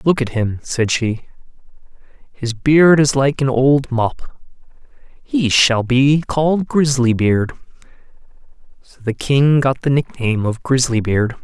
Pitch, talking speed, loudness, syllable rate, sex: 130 Hz, 140 wpm, -16 LUFS, 3.9 syllables/s, male